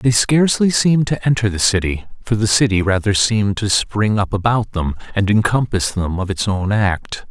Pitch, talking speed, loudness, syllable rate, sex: 105 Hz, 195 wpm, -17 LUFS, 5.1 syllables/s, male